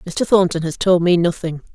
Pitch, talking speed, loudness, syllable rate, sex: 175 Hz, 205 wpm, -17 LUFS, 5.3 syllables/s, female